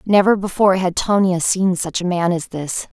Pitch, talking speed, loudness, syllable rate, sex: 185 Hz, 200 wpm, -18 LUFS, 5.0 syllables/s, female